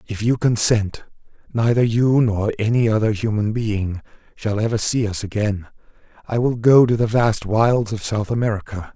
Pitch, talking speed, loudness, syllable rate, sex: 110 Hz, 165 wpm, -19 LUFS, 4.7 syllables/s, male